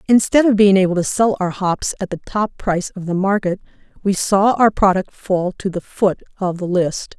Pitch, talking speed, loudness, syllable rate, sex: 190 Hz, 215 wpm, -17 LUFS, 4.9 syllables/s, female